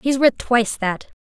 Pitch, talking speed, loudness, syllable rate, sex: 240 Hz, 195 wpm, -19 LUFS, 4.6 syllables/s, female